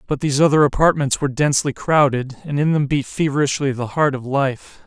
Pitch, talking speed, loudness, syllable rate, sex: 140 Hz, 195 wpm, -18 LUFS, 5.9 syllables/s, male